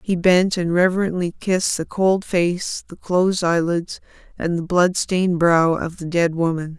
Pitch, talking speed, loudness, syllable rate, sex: 175 Hz, 175 wpm, -19 LUFS, 4.5 syllables/s, female